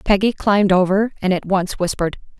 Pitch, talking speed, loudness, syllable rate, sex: 195 Hz, 175 wpm, -18 LUFS, 5.9 syllables/s, female